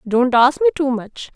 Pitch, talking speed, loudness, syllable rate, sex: 260 Hz, 220 wpm, -16 LUFS, 4.5 syllables/s, female